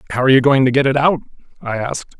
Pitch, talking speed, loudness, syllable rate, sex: 130 Hz, 275 wpm, -15 LUFS, 8.3 syllables/s, male